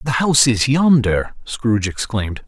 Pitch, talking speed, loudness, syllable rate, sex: 125 Hz, 145 wpm, -17 LUFS, 4.9 syllables/s, male